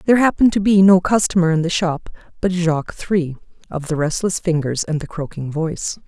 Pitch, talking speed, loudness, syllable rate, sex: 170 Hz, 200 wpm, -18 LUFS, 5.7 syllables/s, female